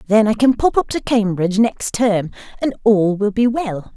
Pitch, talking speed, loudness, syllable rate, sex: 215 Hz, 210 wpm, -17 LUFS, 4.7 syllables/s, female